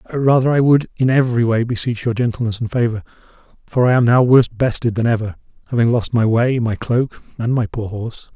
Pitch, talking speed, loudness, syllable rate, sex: 120 Hz, 210 wpm, -17 LUFS, 5.9 syllables/s, male